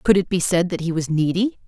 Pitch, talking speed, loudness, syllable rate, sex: 175 Hz, 285 wpm, -20 LUFS, 6.0 syllables/s, female